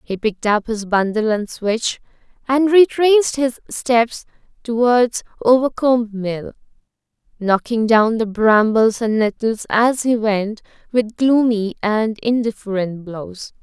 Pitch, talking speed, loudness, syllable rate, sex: 225 Hz, 125 wpm, -17 LUFS, 3.9 syllables/s, female